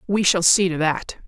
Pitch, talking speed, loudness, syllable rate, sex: 180 Hz, 235 wpm, -19 LUFS, 4.7 syllables/s, female